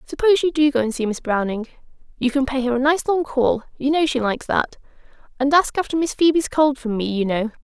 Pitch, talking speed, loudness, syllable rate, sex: 270 Hz, 245 wpm, -20 LUFS, 6.0 syllables/s, female